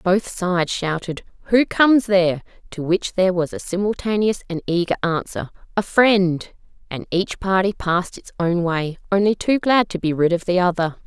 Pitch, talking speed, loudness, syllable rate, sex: 185 Hz, 180 wpm, -20 LUFS, 5.0 syllables/s, female